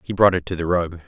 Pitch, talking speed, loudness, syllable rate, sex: 90 Hz, 335 wpm, -20 LUFS, 6.5 syllables/s, male